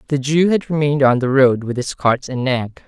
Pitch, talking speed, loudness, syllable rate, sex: 135 Hz, 250 wpm, -17 LUFS, 5.3 syllables/s, male